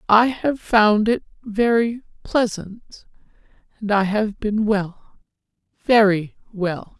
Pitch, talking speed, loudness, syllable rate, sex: 210 Hz, 95 wpm, -19 LUFS, 3.2 syllables/s, female